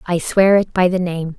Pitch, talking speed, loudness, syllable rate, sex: 180 Hz, 260 wpm, -16 LUFS, 4.7 syllables/s, female